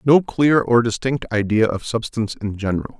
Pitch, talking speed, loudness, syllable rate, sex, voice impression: 115 Hz, 180 wpm, -19 LUFS, 5.7 syllables/s, male, masculine, adult-like, slightly thick, tensed, slightly soft, clear, cool, intellectual, calm, friendly, reassuring, wild, lively, slightly kind